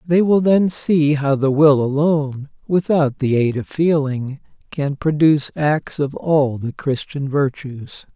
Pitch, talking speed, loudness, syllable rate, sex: 145 Hz, 155 wpm, -18 LUFS, 3.9 syllables/s, male